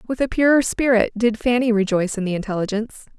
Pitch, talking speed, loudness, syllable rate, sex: 225 Hz, 190 wpm, -19 LUFS, 6.6 syllables/s, female